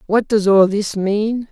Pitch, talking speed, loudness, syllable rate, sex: 205 Hz, 200 wpm, -16 LUFS, 3.7 syllables/s, female